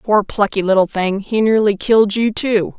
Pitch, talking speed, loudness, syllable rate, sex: 205 Hz, 195 wpm, -15 LUFS, 4.9 syllables/s, female